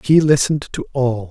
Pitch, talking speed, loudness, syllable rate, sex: 130 Hz, 185 wpm, -17 LUFS, 5.5 syllables/s, male